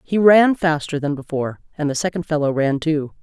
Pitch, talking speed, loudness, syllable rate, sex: 155 Hz, 205 wpm, -19 LUFS, 5.5 syllables/s, female